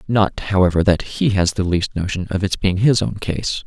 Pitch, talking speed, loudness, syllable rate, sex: 100 Hz, 230 wpm, -18 LUFS, 4.9 syllables/s, male